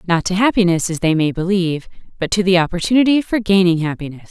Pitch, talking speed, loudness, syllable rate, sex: 185 Hz, 195 wpm, -16 LUFS, 6.5 syllables/s, female